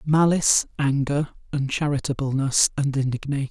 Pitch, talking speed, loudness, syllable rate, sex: 140 Hz, 85 wpm, -22 LUFS, 5.2 syllables/s, male